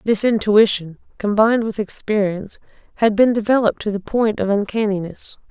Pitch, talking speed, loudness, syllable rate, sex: 210 Hz, 140 wpm, -18 LUFS, 5.5 syllables/s, female